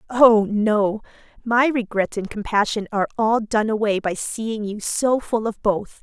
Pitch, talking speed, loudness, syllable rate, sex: 215 Hz, 170 wpm, -21 LUFS, 4.2 syllables/s, female